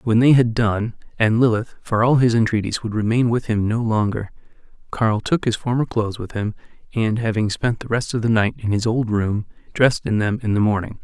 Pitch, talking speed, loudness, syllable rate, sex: 110 Hz, 225 wpm, -20 LUFS, 5.5 syllables/s, male